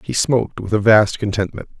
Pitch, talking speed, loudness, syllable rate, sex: 105 Hz, 200 wpm, -17 LUFS, 5.6 syllables/s, male